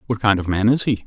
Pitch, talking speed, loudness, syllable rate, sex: 105 Hz, 340 wpm, -18 LUFS, 6.6 syllables/s, male